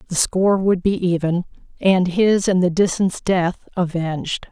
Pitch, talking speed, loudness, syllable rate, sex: 185 Hz, 160 wpm, -19 LUFS, 4.4 syllables/s, female